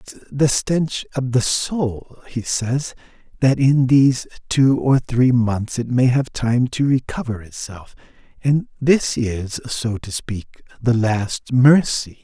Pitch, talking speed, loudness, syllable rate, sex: 125 Hz, 150 wpm, -19 LUFS, 3.5 syllables/s, male